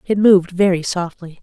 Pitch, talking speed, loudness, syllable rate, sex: 185 Hz, 170 wpm, -16 LUFS, 5.3 syllables/s, female